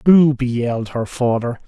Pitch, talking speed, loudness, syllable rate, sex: 125 Hz, 145 wpm, -18 LUFS, 4.6 syllables/s, male